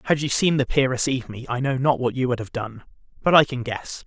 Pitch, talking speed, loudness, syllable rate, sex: 130 Hz, 280 wpm, -22 LUFS, 6.0 syllables/s, male